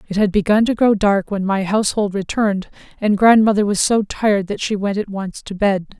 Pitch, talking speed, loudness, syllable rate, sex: 205 Hz, 220 wpm, -17 LUFS, 5.5 syllables/s, female